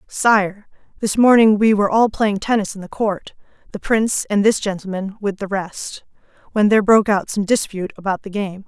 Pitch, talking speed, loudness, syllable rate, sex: 205 Hz, 195 wpm, -18 LUFS, 5.4 syllables/s, female